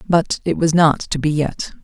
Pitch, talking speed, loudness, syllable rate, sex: 160 Hz, 230 wpm, -18 LUFS, 4.5 syllables/s, female